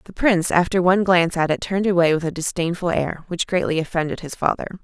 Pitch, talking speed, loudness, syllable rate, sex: 175 Hz, 225 wpm, -20 LUFS, 6.6 syllables/s, female